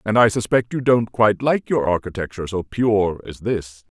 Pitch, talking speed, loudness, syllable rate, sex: 105 Hz, 195 wpm, -20 LUFS, 5.1 syllables/s, male